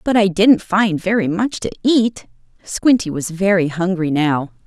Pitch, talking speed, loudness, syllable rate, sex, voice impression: 190 Hz, 165 wpm, -17 LUFS, 4.3 syllables/s, female, feminine, adult-like, tensed, powerful, clear, fluent, intellectual, calm, slightly reassuring, elegant, lively, slightly sharp